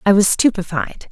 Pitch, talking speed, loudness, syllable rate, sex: 195 Hz, 160 wpm, -16 LUFS, 5.1 syllables/s, female